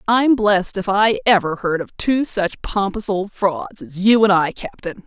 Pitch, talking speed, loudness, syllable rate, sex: 200 Hz, 200 wpm, -18 LUFS, 4.3 syllables/s, female